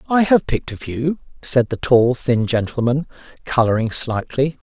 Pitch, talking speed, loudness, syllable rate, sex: 130 Hz, 155 wpm, -19 LUFS, 4.7 syllables/s, male